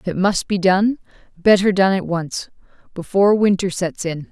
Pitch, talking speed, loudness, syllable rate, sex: 185 Hz, 165 wpm, -18 LUFS, 4.9 syllables/s, female